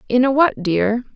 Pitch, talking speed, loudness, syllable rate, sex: 240 Hz, 205 wpm, -17 LUFS, 4.6 syllables/s, female